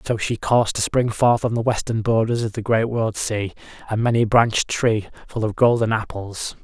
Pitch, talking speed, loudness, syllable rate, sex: 110 Hz, 210 wpm, -20 LUFS, 5.1 syllables/s, male